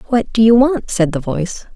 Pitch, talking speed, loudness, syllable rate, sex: 220 Hz, 240 wpm, -15 LUFS, 5.5 syllables/s, female